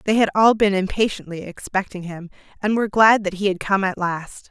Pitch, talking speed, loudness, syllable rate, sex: 195 Hz, 215 wpm, -19 LUFS, 5.5 syllables/s, female